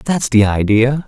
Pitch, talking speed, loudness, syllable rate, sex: 120 Hz, 170 wpm, -14 LUFS, 3.9 syllables/s, male